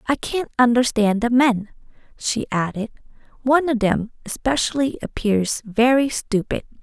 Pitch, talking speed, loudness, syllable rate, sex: 240 Hz, 125 wpm, -20 LUFS, 4.5 syllables/s, female